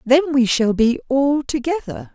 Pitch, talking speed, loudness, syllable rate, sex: 255 Hz, 170 wpm, -18 LUFS, 4.1 syllables/s, female